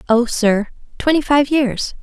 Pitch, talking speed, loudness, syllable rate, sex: 250 Hz, 150 wpm, -16 LUFS, 3.9 syllables/s, female